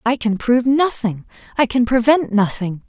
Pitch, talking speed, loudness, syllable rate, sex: 235 Hz, 165 wpm, -17 LUFS, 4.9 syllables/s, female